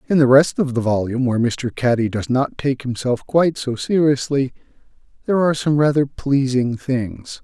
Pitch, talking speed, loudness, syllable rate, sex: 135 Hz, 180 wpm, -19 LUFS, 5.2 syllables/s, male